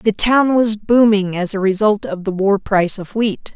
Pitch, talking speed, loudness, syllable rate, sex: 205 Hz, 220 wpm, -16 LUFS, 4.6 syllables/s, female